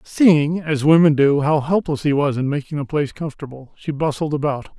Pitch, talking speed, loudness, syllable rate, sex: 150 Hz, 200 wpm, -18 LUFS, 5.5 syllables/s, male